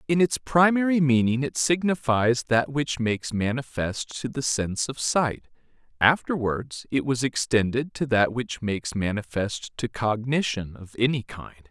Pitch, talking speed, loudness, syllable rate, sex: 125 Hz, 150 wpm, -24 LUFS, 4.5 syllables/s, male